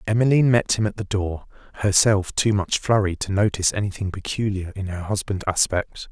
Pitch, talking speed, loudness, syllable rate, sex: 100 Hz, 175 wpm, -22 LUFS, 5.6 syllables/s, male